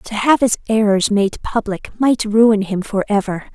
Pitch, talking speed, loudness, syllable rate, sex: 215 Hz, 185 wpm, -16 LUFS, 4.3 syllables/s, female